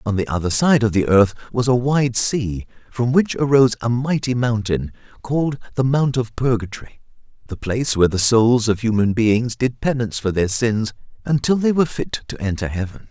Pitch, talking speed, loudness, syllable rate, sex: 120 Hz, 190 wpm, -19 LUFS, 5.3 syllables/s, male